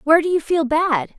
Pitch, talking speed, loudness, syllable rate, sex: 315 Hz, 255 wpm, -18 LUFS, 5.9 syllables/s, female